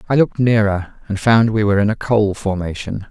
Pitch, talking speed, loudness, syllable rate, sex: 105 Hz, 215 wpm, -17 LUFS, 5.6 syllables/s, male